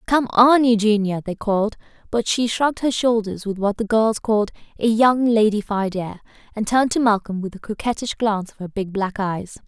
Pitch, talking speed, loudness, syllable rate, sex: 215 Hz, 200 wpm, -20 LUFS, 5.3 syllables/s, female